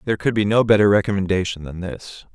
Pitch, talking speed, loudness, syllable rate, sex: 100 Hz, 205 wpm, -19 LUFS, 6.5 syllables/s, male